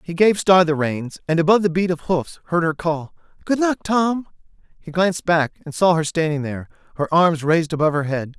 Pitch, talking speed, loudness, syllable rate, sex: 165 Hz, 220 wpm, -19 LUFS, 5.7 syllables/s, male